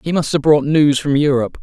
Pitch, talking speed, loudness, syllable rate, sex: 145 Hz, 260 wpm, -15 LUFS, 6.0 syllables/s, male